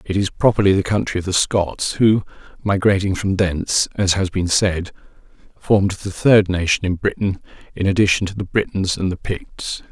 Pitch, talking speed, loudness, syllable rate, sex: 95 Hz, 180 wpm, -18 LUFS, 5.1 syllables/s, male